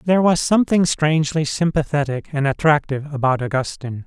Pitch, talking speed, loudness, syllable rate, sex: 150 Hz, 135 wpm, -19 LUFS, 6.1 syllables/s, male